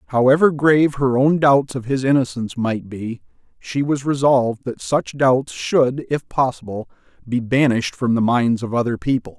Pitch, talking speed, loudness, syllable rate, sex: 130 Hz, 175 wpm, -18 LUFS, 4.9 syllables/s, male